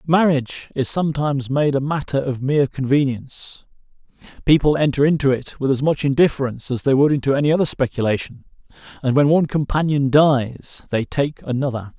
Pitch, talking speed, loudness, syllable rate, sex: 140 Hz, 160 wpm, -19 LUFS, 5.8 syllables/s, male